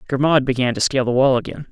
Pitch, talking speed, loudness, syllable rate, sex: 130 Hz, 245 wpm, -18 LUFS, 7.2 syllables/s, male